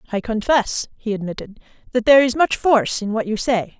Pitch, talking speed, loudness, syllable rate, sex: 230 Hz, 205 wpm, -19 LUFS, 5.8 syllables/s, female